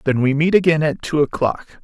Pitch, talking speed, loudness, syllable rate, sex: 150 Hz, 230 wpm, -17 LUFS, 5.7 syllables/s, male